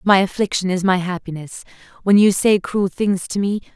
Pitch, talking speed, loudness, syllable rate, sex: 190 Hz, 190 wpm, -18 LUFS, 5.1 syllables/s, female